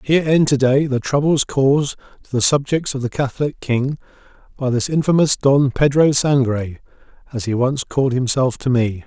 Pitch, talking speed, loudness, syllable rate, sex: 135 Hz, 180 wpm, -17 LUFS, 5.2 syllables/s, male